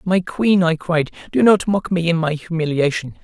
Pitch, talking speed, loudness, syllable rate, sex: 170 Hz, 205 wpm, -18 LUFS, 4.8 syllables/s, male